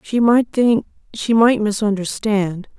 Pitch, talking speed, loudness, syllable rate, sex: 215 Hz, 110 wpm, -17 LUFS, 3.8 syllables/s, female